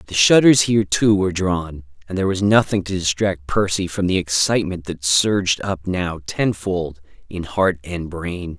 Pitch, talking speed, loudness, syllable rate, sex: 90 Hz, 175 wpm, -19 LUFS, 4.8 syllables/s, male